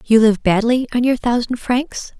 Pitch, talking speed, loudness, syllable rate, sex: 235 Hz, 190 wpm, -17 LUFS, 4.5 syllables/s, female